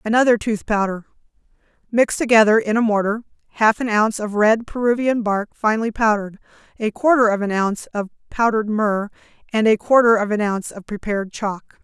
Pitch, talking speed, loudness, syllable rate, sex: 215 Hz, 165 wpm, -19 LUFS, 5.9 syllables/s, female